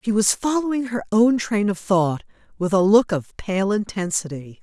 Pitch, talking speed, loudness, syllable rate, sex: 205 Hz, 180 wpm, -20 LUFS, 4.6 syllables/s, female